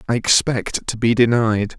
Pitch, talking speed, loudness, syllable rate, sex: 115 Hz, 170 wpm, -17 LUFS, 4.4 syllables/s, male